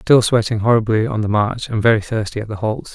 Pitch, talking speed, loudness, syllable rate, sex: 110 Hz, 245 wpm, -17 LUFS, 5.8 syllables/s, male